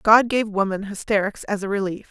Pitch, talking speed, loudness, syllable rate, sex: 205 Hz, 200 wpm, -22 LUFS, 5.5 syllables/s, female